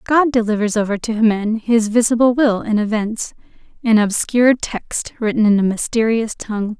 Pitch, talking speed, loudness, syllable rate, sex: 225 Hz, 160 wpm, -17 LUFS, 4.9 syllables/s, female